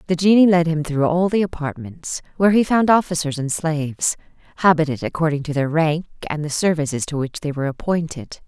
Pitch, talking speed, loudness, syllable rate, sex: 160 Hz, 190 wpm, -19 LUFS, 5.7 syllables/s, female